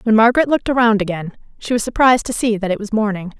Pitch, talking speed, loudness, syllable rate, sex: 220 Hz, 250 wpm, -16 LUFS, 7.2 syllables/s, female